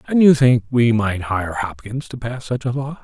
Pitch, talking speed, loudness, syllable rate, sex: 120 Hz, 240 wpm, -18 LUFS, 4.6 syllables/s, male